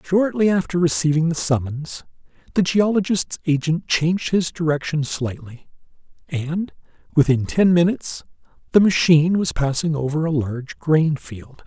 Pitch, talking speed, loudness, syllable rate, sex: 160 Hz, 130 wpm, -20 LUFS, 4.8 syllables/s, male